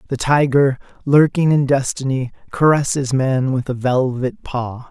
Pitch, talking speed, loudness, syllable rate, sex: 135 Hz, 135 wpm, -17 LUFS, 4.5 syllables/s, male